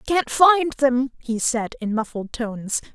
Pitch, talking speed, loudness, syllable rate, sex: 255 Hz, 185 wpm, -21 LUFS, 4.4 syllables/s, female